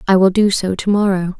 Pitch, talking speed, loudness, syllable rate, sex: 190 Hz, 260 wpm, -15 LUFS, 5.7 syllables/s, female